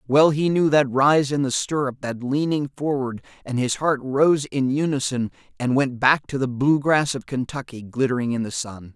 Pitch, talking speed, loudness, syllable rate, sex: 135 Hz, 200 wpm, -22 LUFS, 4.7 syllables/s, male